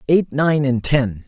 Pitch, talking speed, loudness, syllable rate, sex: 140 Hz, 190 wpm, -18 LUFS, 3.7 syllables/s, male